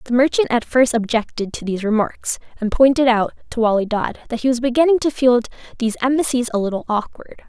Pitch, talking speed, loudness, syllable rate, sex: 240 Hz, 200 wpm, -18 LUFS, 6.2 syllables/s, female